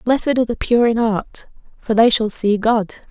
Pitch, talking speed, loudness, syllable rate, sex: 225 Hz, 215 wpm, -17 LUFS, 5.0 syllables/s, female